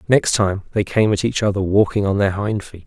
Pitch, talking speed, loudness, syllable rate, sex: 100 Hz, 250 wpm, -18 LUFS, 5.4 syllables/s, male